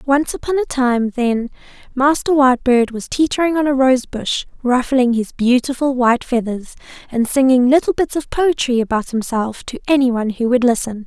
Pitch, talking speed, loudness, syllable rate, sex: 255 Hz, 175 wpm, -16 LUFS, 5.2 syllables/s, female